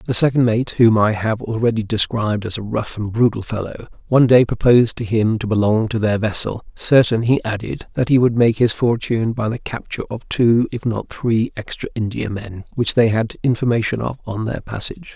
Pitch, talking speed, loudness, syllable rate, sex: 115 Hz, 200 wpm, -18 LUFS, 5.4 syllables/s, male